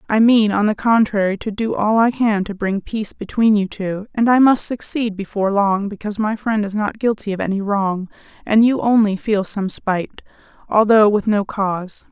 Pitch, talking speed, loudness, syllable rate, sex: 210 Hz, 205 wpm, -18 LUFS, 5.1 syllables/s, female